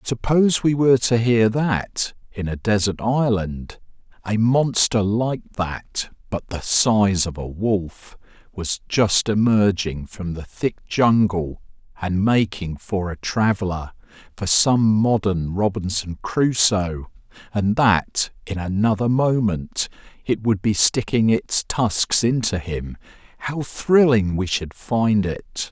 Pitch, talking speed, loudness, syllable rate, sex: 105 Hz, 130 wpm, -20 LUFS, 3.5 syllables/s, male